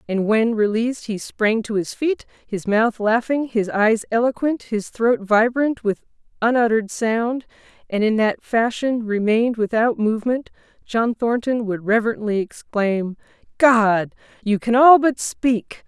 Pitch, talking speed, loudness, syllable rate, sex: 225 Hz, 145 wpm, -20 LUFS, 4.2 syllables/s, female